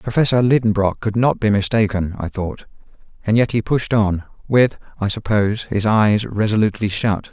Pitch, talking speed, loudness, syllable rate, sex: 105 Hz, 165 wpm, -18 LUFS, 5.2 syllables/s, male